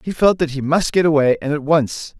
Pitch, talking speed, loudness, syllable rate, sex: 150 Hz, 275 wpm, -17 LUFS, 5.4 syllables/s, male